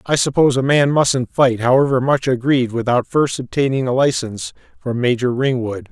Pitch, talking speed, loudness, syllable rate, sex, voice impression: 130 Hz, 175 wpm, -17 LUFS, 5.4 syllables/s, male, masculine, middle-aged, thick, tensed, powerful, slightly hard, raspy, mature, friendly, wild, lively, strict, slightly intense